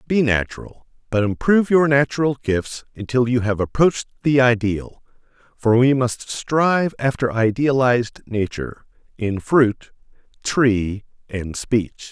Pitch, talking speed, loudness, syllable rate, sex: 120 Hz, 120 wpm, -19 LUFS, 4.4 syllables/s, male